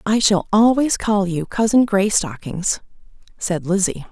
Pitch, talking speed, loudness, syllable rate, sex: 195 Hz, 130 wpm, -18 LUFS, 4.1 syllables/s, female